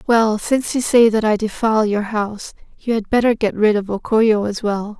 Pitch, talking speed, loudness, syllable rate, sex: 215 Hz, 230 wpm, -17 LUFS, 5.2 syllables/s, female